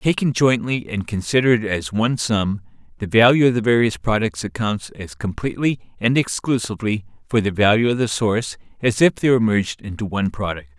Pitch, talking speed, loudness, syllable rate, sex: 110 Hz, 180 wpm, -19 LUFS, 5.8 syllables/s, male